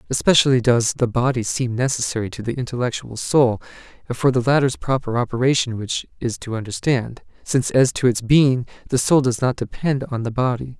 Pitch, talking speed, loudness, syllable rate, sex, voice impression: 125 Hz, 180 wpm, -20 LUFS, 5.5 syllables/s, male, masculine, slightly adult-like, slightly fluent, slightly calm, friendly, slightly kind